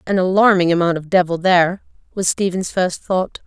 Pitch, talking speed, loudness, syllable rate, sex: 180 Hz, 175 wpm, -17 LUFS, 5.3 syllables/s, female